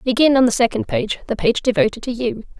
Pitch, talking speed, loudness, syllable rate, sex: 230 Hz, 230 wpm, -18 LUFS, 6.1 syllables/s, female